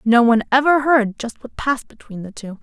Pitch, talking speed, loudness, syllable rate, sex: 240 Hz, 230 wpm, -17 LUFS, 5.7 syllables/s, female